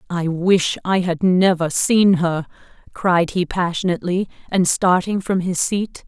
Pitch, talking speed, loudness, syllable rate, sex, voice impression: 180 Hz, 150 wpm, -18 LUFS, 4.1 syllables/s, female, very feminine, very adult-like, middle-aged, thin, tensed, powerful, bright, slightly hard, very clear, fluent, slightly cute, cool, very intellectual, very refreshing, sincere, calm, slightly friendly, reassuring, unique, elegant, slightly wild, very lively, strict, intense, slightly sharp